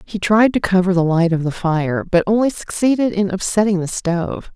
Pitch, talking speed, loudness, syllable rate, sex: 190 Hz, 210 wpm, -17 LUFS, 5.3 syllables/s, female